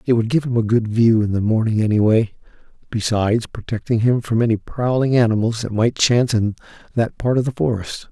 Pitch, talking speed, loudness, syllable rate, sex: 115 Hz, 200 wpm, -19 LUFS, 5.7 syllables/s, male